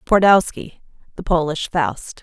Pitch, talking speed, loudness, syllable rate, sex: 175 Hz, 110 wpm, -18 LUFS, 4.0 syllables/s, female